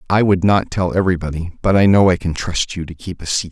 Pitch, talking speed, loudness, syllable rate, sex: 90 Hz, 275 wpm, -17 LUFS, 6.3 syllables/s, male